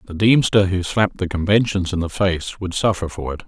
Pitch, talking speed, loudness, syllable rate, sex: 95 Hz, 225 wpm, -19 LUFS, 5.6 syllables/s, male